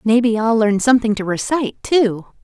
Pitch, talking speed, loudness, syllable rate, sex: 225 Hz, 195 wpm, -17 LUFS, 5.5 syllables/s, female